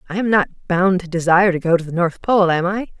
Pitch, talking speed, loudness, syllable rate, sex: 180 Hz, 280 wpm, -17 LUFS, 6.2 syllables/s, female